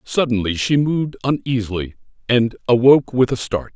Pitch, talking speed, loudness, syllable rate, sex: 120 Hz, 145 wpm, -18 LUFS, 5.5 syllables/s, male